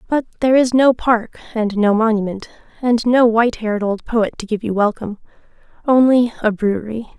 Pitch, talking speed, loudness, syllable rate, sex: 225 Hz, 165 wpm, -17 LUFS, 5.7 syllables/s, female